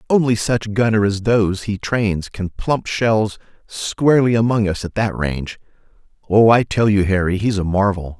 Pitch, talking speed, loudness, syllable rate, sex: 105 Hz, 175 wpm, -18 LUFS, 4.7 syllables/s, male